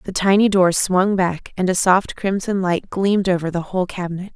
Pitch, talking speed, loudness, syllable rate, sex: 185 Hz, 205 wpm, -18 LUFS, 5.3 syllables/s, female